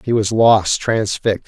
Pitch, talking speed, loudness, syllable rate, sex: 110 Hz, 165 wpm, -16 LUFS, 4.4 syllables/s, male